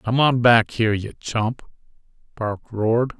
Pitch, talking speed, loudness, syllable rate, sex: 115 Hz, 150 wpm, -20 LUFS, 4.2 syllables/s, male